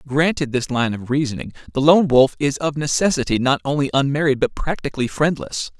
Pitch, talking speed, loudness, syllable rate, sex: 140 Hz, 175 wpm, -19 LUFS, 5.7 syllables/s, male